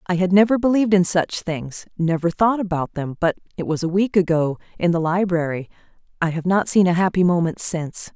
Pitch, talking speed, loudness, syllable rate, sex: 180 Hz, 175 wpm, -20 LUFS, 5.6 syllables/s, female